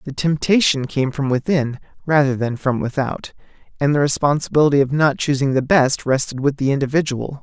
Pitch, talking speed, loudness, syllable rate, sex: 140 Hz, 170 wpm, -18 LUFS, 5.5 syllables/s, male